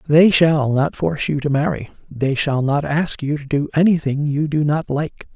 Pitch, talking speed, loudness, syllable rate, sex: 150 Hz, 215 wpm, -18 LUFS, 4.7 syllables/s, male